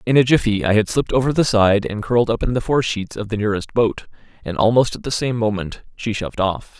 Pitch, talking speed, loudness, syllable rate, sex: 110 Hz, 255 wpm, -19 LUFS, 6.2 syllables/s, male